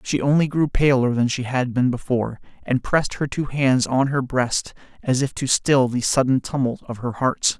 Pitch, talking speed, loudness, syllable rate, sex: 130 Hz, 215 wpm, -21 LUFS, 4.9 syllables/s, male